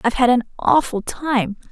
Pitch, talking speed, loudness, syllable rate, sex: 250 Hz, 175 wpm, -19 LUFS, 5.2 syllables/s, female